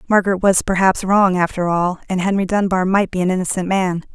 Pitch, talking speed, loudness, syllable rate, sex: 185 Hz, 205 wpm, -17 LUFS, 5.8 syllables/s, female